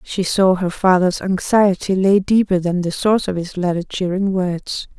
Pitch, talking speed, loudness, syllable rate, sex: 185 Hz, 180 wpm, -17 LUFS, 4.6 syllables/s, female